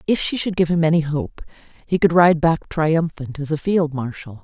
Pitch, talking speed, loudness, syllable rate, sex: 160 Hz, 215 wpm, -19 LUFS, 4.9 syllables/s, female